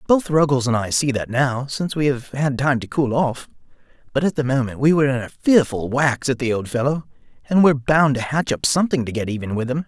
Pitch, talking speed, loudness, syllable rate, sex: 135 Hz, 250 wpm, -20 LUFS, 6.0 syllables/s, male